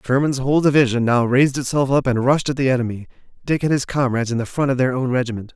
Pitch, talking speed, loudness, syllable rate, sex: 130 Hz, 250 wpm, -19 LUFS, 6.9 syllables/s, male